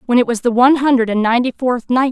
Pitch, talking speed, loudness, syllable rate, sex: 245 Hz, 285 wpm, -15 LUFS, 7.1 syllables/s, female